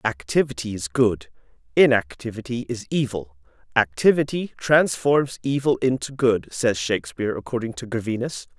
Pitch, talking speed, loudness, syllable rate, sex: 120 Hz, 110 wpm, -22 LUFS, 5.0 syllables/s, male